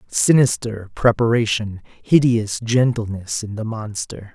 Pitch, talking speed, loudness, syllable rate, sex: 110 Hz, 95 wpm, -19 LUFS, 4.0 syllables/s, male